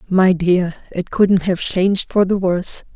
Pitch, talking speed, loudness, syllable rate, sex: 185 Hz, 185 wpm, -17 LUFS, 4.4 syllables/s, female